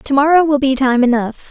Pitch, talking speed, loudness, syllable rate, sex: 270 Hz, 200 wpm, -13 LUFS, 5.5 syllables/s, female